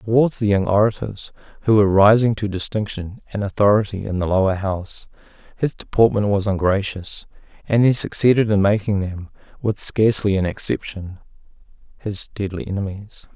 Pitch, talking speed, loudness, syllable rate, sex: 100 Hz, 145 wpm, -19 LUFS, 5.3 syllables/s, male